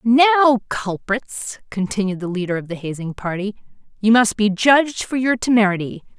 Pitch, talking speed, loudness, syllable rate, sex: 215 Hz, 155 wpm, -19 LUFS, 5.2 syllables/s, female